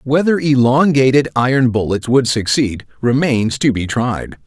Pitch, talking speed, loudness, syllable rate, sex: 125 Hz, 135 wpm, -15 LUFS, 4.3 syllables/s, male